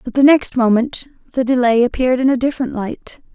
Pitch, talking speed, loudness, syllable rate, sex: 250 Hz, 195 wpm, -16 LUFS, 5.9 syllables/s, female